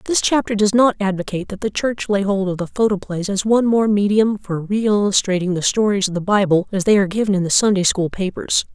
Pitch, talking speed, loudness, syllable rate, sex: 200 Hz, 225 wpm, -18 LUFS, 5.9 syllables/s, female